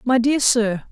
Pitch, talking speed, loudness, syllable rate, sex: 240 Hz, 195 wpm, -18 LUFS, 3.8 syllables/s, female